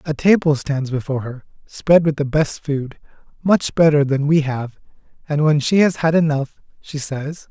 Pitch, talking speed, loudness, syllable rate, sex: 145 Hz, 185 wpm, -18 LUFS, 4.6 syllables/s, male